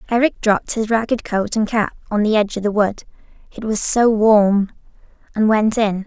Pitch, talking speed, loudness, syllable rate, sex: 215 Hz, 180 wpm, -17 LUFS, 5.1 syllables/s, female